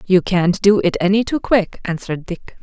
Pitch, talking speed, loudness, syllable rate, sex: 190 Hz, 205 wpm, -17 LUFS, 4.9 syllables/s, female